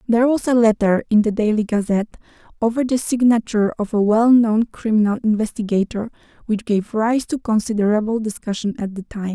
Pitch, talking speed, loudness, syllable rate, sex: 220 Hz, 160 wpm, -19 LUFS, 5.8 syllables/s, female